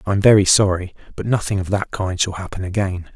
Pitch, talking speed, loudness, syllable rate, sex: 95 Hz, 210 wpm, -18 LUFS, 5.7 syllables/s, male